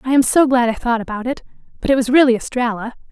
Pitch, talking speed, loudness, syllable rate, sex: 245 Hz, 250 wpm, -17 LUFS, 6.8 syllables/s, female